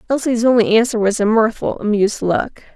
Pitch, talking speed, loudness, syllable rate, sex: 225 Hz, 175 wpm, -16 LUFS, 5.7 syllables/s, female